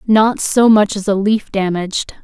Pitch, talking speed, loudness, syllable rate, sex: 205 Hz, 190 wpm, -14 LUFS, 4.5 syllables/s, female